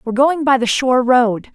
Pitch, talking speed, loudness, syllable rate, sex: 255 Hz, 235 wpm, -15 LUFS, 5.5 syllables/s, female